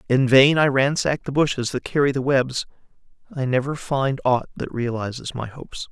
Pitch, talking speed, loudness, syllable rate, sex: 130 Hz, 185 wpm, -21 LUFS, 5.2 syllables/s, male